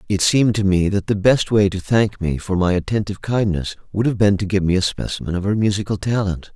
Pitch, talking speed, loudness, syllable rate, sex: 100 Hz, 245 wpm, -19 LUFS, 6.0 syllables/s, male